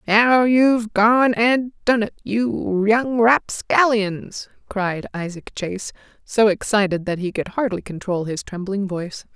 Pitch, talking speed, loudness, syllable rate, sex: 210 Hz, 140 wpm, -19 LUFS, 4.0 syllables/s, female